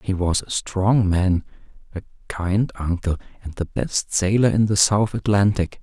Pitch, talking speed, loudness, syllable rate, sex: 95 Hz, 165 wpm, -21 LUFS, 4.3 syllables/s, male